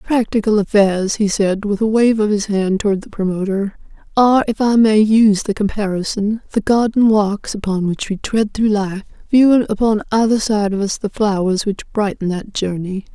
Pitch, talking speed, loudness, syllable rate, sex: 210 Hz, 185 wpm, -16 LUFS, 5.1 syllables/s, female